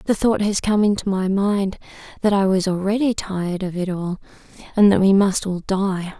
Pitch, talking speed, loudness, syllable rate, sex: 195 Hz, 205 wpm, -20 LUFS, 5.0 syllables/s, female